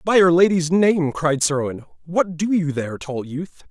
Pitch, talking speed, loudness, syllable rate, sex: 165 Hz, 195 wpm, -19 LUFS, 4.5 syllables/s, male